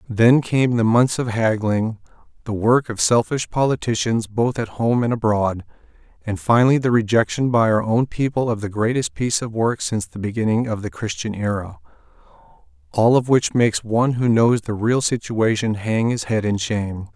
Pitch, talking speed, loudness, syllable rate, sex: 115 Hz, 180 wpm, -19 LUFS, 5.1 syllables/s, male